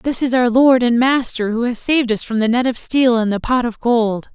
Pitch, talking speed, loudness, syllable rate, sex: 240 Hz, 275 wpm, -16 LUFS, 5.1 syllables/s, female